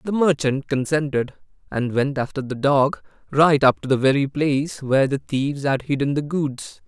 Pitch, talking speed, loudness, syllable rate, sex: 140 Hz, 185 wpm, -21 LUFS, 4.9 syllables/s, male